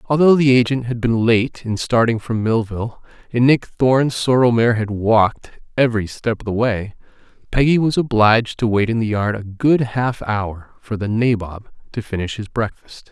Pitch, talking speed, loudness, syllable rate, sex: 115 Hz, 190 wpm, -18 LUFS, 4.9 syllables/s, male